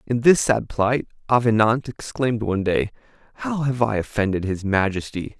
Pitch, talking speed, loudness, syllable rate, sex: 110 Hz, 155 wpm, -21 LUFS, 5.1 syllables/s, male